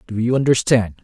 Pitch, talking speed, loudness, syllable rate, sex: 120 Hz, 175 wpm, -17 LUFS, 5.7 syllables/s, male